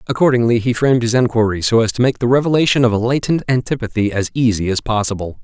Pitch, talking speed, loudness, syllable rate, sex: 120 Hz, 210 wpm, -16 LUFS, 6.7 syllables/s, male